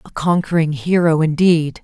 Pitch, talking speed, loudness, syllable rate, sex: 160 Hz, 130 wpm, -16 LUFS, 4.6 syllables/s, female